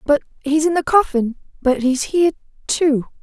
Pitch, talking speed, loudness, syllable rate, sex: 290 Hz, 165 wpm, -18 LUFS, 5.0 syllables/s, female